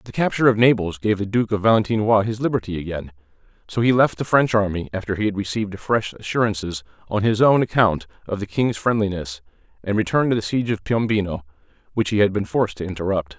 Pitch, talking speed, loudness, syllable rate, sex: 105 Hz, 205 wpm, -21 LUFS, 6.4 syllables/s, male